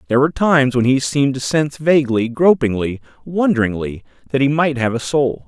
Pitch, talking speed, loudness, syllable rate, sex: 135 Hz, 185 wpm, -17 LUFS, 6.1 syllables/s, male